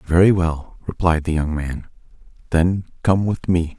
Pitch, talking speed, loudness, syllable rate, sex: 85 Hz, 160 wpm, -20 LUFS, 4.3 syllables/s, male